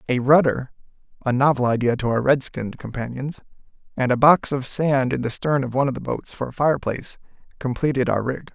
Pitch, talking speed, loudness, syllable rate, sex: 130 Hz, 210 wpm, -21 LUFS, 4.4 syllables/s, male